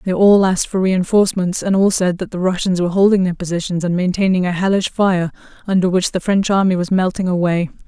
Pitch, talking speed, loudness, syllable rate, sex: 185 Hz, 215 wpm, -16 LUFS, 6.1 syllables/s, female